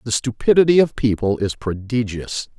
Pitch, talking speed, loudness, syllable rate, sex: 120 Hz, 140 wpm, -19 LUFS, 5.0 syllables/s, male